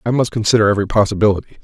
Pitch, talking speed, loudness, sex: 105 Hz, 185 wpm, -15 LUFS, male